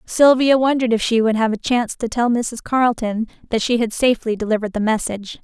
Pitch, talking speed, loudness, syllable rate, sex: 230 Hz, 210 wpm, -18 LUFS, 6.4 syllables/s, female